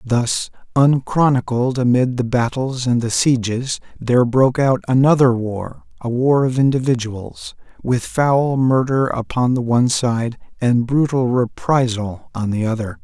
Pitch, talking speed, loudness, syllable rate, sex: 125 Hz, 140 wpm, -18 LUFS, 4.2 syllables/s, male